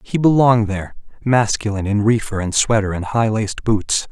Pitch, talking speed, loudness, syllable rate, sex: 110 Hz, 175 wpm, -18 LUFS, 5.6 syllables/s, male